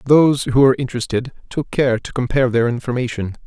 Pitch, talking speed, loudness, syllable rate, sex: 125 Hz, 175 wpm, -18 LUFS, 6.6 syllables/s, male